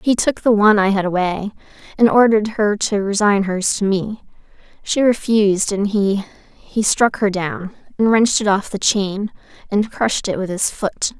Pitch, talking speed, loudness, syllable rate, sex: 205 Hz, 180 wpm, -17 LUFS, 4.9 syllables/s, female